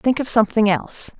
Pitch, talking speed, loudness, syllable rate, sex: 225 Hz, 200 wpm, -18 LUFS, 6.4 syllables/s, female